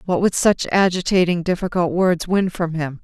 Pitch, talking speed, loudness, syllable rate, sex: 175 Hz, 180 wpm, -19 LUFS, 4.8 syllables/s, female